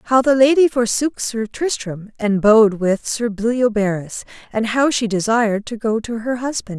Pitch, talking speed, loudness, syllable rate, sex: 230 Hz, 175 wpm, -18 LUFS, 4.6 syllables/s, female